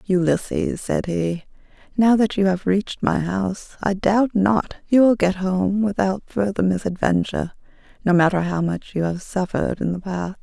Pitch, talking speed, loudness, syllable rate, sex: 190 Hz, 175 wpm, -21 LUFS, 4.8 syllables/s, female